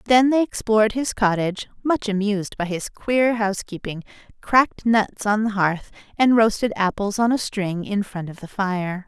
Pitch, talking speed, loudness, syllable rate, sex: 210 Hz, 180 wpm, -21 LUFS, 4.9 syllables/s, female